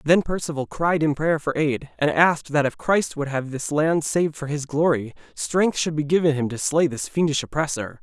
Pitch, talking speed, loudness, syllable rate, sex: 150 Hz, 225 wpm, -22 LUFS, 5.1 syllables/s, male